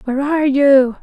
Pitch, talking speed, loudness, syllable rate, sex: 275 Hz, 175 wpm, -14 LUFS, 5.6 syllables/s, female